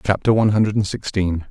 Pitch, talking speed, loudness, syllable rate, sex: 100 Hz, 160 wpm, -19 LUFS, 5.8 syllables/s, male